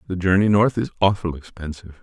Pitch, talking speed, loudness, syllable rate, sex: 90 Hz, 180 wpm, -19 LUFS, 6.4 syllables/s, male